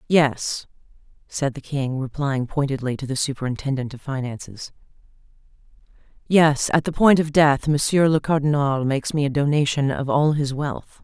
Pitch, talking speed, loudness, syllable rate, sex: 140 Hz, 150 wpm, -21 LUFS, 4.9 syllables/s, female